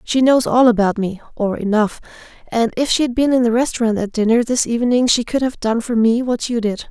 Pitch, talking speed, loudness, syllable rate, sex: 235 Hz, 215 wpm, -17 LUFS, 5.5 syllables/s, female